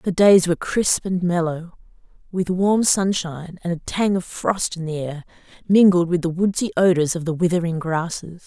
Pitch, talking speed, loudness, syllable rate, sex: 175 Hz, 185 wpm, -20 LUFS, 4.9 syllables/s, female